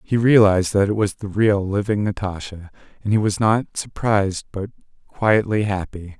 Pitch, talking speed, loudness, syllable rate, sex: 100 Hz, 165 wpm, -20 LUFS, 4.9 syllables/s, male